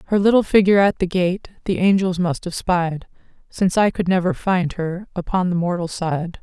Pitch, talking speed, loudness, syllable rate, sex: 180 Hz, 195 wpm, -19 LUFS, 5.2 syllables/s, female